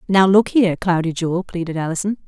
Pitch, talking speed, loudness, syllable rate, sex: 180 Hz, 185 wpm, -18 LUFS, 6.3 syllables/s, female